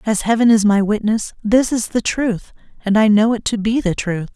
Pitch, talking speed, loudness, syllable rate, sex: 215 Hz, 235 wpm, -16 LUFS, 5.0 syllables/s, female